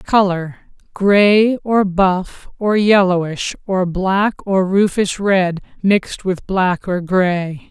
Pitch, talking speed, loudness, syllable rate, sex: 190 Hz, 115 wpm, -16 LUFS, 3.0 syllables/s, female